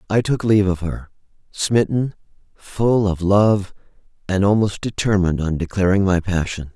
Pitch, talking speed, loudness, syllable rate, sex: 100 Hz, 140 wpm, -19 LUFS, 4.8 syllables/s, male